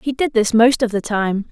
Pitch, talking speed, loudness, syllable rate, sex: 230 Hz, 280 wpm, -17 LUFS, 5.0 syllables/s, female